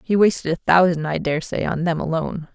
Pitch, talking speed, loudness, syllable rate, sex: 170 Hz, 210 wpm, -20 LUFS, 6.2 syllables/s, female